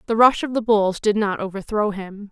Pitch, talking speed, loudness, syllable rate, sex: 210 Hz, 235 wpm, -20 LUFS, 5.2 syllables/s, female